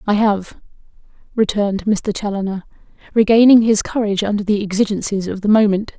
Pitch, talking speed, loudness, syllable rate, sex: 205 Hz, 140 wpm, -16 LUFS, 6.0 syllables/s, female